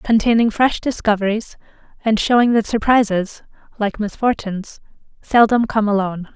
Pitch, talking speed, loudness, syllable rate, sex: 215 Hz, 115 wpm, -17 LUFS, 5.1 syllables/s, female